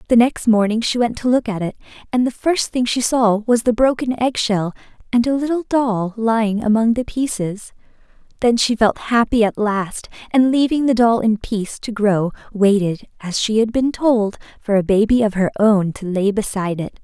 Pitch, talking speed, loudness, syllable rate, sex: 225 Hz, 200 wpm, -18 LUFS, 4.9 syllables/s, female